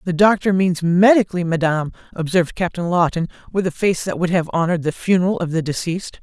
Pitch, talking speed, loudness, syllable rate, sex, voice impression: 175 Hz, 195 wpm, -18 LUFS, 6.2 syllables/s, female, feminine, adult-like, slightly middle-aged, slightly thin, tensed, powerful, slightly bright, very hard, clear, fluent, slightly cool, intellectual, very sincere, slightly calm, slightly mature, slightly friendly, slightly reassuring, very unique, wild, very lively, slightly intense, slightly sharp